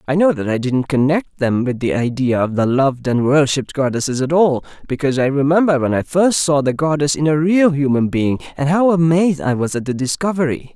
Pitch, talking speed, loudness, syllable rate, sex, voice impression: 140 Hz, 225 wpm, -16 LUFS, 5.7 syllables/s, male, very masculine, very adult-like, tensed, very clear, refreshing, lively